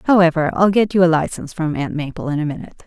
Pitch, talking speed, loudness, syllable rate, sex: 165 Hz, 250 wpm, -18 LUFS, 7.4 syllables/s, female